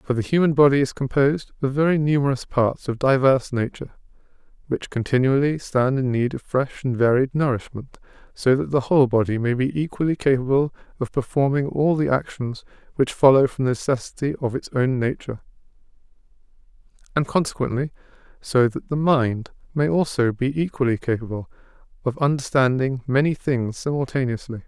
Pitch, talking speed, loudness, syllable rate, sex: 135 Hz, 150 wpm, -21 LUFS, 5.6 syllables/s, male